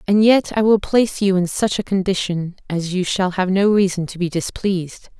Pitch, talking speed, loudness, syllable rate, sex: 190 Hz, 220 wpm, -18 LUFS, 5.1 syllables/s, female